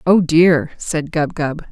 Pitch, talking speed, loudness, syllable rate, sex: 160 Hz, 175 wpm, -16 LUFS, 3.3 syllables/s, female